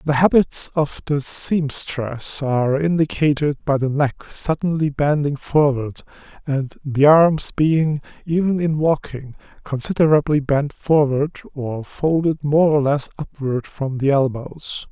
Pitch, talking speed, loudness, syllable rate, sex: 145 Hz, 130 wpm, -19 LUFS, 3.9 syllables/s, male